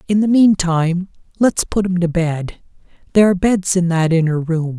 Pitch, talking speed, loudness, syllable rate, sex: 180 Hz, 175 wpm, -16 LUFS, 5.3 syllables/s, male